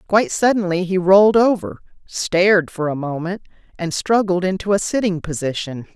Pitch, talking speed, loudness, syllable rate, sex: 180 Hz, 150 wpm, -18 LUFS, 5.2 syllables/s, female